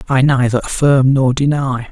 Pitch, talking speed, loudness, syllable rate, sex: 130 Hz, 155 wpm, -14 LUFS, 4.7 syllables/s, male